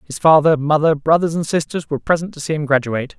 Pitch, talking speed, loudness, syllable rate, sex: 155 Hz, 225 wpm, -17 LUFS, 6.5 syllables/s, male